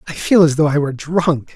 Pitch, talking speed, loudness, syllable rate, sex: 155 Hz, 270 wpm, -15 LUFS, 5.7 syllables/s, male